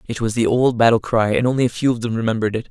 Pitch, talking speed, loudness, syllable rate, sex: 115 Hz, 310 wpm, -18 LUFS, 7.3 syllables/s, male